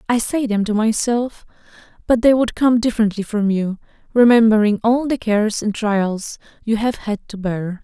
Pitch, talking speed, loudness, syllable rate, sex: 220 Hz, 175 wpm, -18 LUFS, 4.8 syllables/s, female